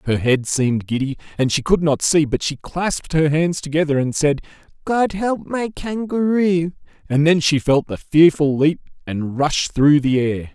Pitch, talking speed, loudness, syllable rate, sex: 155 Hz, 190 wpm, -18 LUFS, 4.5 syllables/s, male